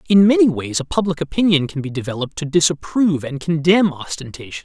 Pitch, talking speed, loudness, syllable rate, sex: 160 Hz, 180 wpm, -18 LUFS, 6.3 syllables/s, male